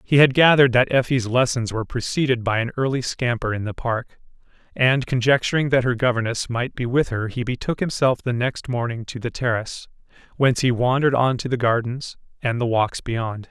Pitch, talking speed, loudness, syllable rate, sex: 125 Hz, 195 wpm, -21 LUFS, 5.5 syllables/s, male